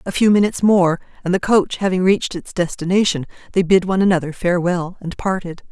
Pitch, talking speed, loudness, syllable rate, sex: 180 Hz, 190 wpm, -18 LUFS, 6.2 syllables/s, female